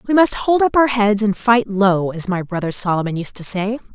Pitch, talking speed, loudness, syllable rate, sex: 210 Hz, 245 wpm, -17 LUFS, 5.2 syllables/s, female